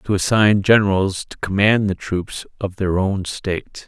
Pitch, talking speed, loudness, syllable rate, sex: 100 Hz, 170 wpm, -19 LUFS, 4.4 syllables/s, male